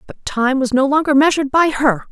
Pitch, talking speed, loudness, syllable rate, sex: 275 Hz, 225 wpm, -15 LUFS, 5.6 syllables/s, female